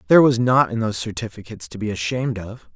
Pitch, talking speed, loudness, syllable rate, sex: 115 Hz, 220 wpm, -20 LUFS, 7.1 syllables/s, male